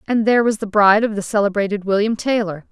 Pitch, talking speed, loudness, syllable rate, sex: 210 Hz, 220 wpm, -17 LUFS, 6.8 syllables/s, female